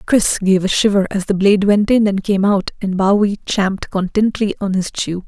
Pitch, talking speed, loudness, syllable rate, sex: 200 Hz, 215 wpm, -16 LUFS, 5.2 syllables/s, female